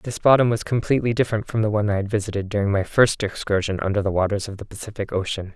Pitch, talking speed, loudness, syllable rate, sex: 105 Hz, 235 wpm, -22 LUFS, 7.1 syllables/s, male